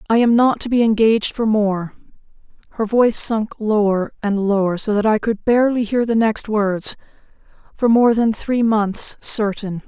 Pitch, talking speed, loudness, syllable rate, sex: 215 Hz, 165 wpm, -17 LUFS, 4.7 syllables/s, female